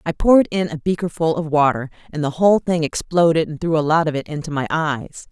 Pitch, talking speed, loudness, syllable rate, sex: 160 Hz, 235 wpm, -19 LUFS, 6.0 syllables/s, female